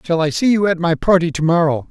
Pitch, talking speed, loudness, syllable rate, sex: 170 Hz, 250 wpm, -16 LUFS, 6.1 syllables/s, male